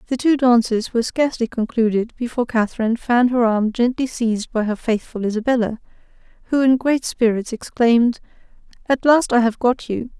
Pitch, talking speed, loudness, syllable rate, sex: 235 Hz, 165 wpm, -19 LUFS, 5.7 syllables/s, female